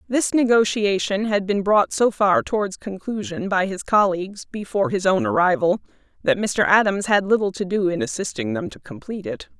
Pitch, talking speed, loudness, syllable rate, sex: 200 Hz, 180 wpm, -21 LUFS, 5.3 syllables/s, female